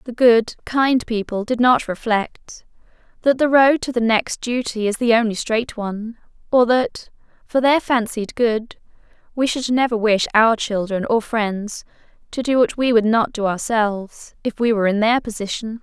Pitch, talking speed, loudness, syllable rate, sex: 230 Hz, 180 wpm, -19 LUFS, 4.5 syllables/s, female